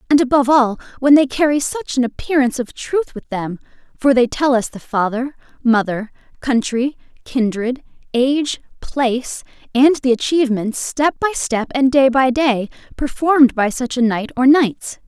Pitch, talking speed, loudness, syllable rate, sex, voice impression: 255 Hz, 165 wpm, -17 LUFS, 4.8 syllables/s, female, feminine, slightly adult-like, slightly fluent, refreshing, slightly friendly, slightly lively